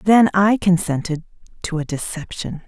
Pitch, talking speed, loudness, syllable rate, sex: 175 Hz, 135 wpm, -19 LUFS, 4.7 syllables/s, female